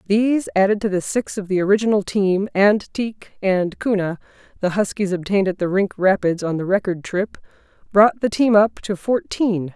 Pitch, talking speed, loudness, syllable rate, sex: 200 Hz, 185 wpm, -19 LUFS, 5.0 syllables/s, female